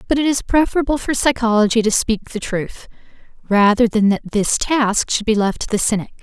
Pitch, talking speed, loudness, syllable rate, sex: 230 Hz, 200 wpm, -17 LUFS, 5.4 syllables/s, female